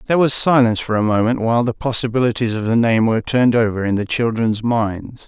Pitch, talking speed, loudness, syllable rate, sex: 115 Hz, 215 wpm, -17 LUFS, 6.3 syllables/s, male